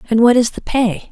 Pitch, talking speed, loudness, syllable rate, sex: 230 Hz, 270 wpm, -15 LUFS, 5.5 syllables/s, female